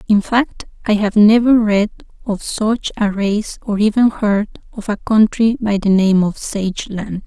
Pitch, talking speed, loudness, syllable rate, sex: 210 Hz, 175 wpm, -16 LUFS, 4.1 syllables/s, female